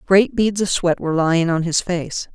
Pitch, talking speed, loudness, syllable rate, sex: 180 Hz, 230 wpm, -19 LUFS, 5.0 syllables/s, female